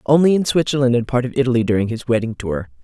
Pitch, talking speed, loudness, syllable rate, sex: 125 Hz, 235 wpm, -18 LUFS, 7.0 syllables/s, female